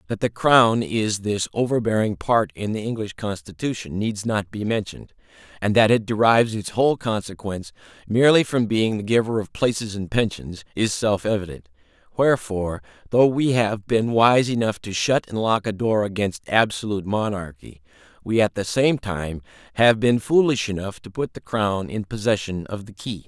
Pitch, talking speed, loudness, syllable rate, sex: 105 Hz, 175 wpm, -22 LUFS, 5.1 syllables/s, male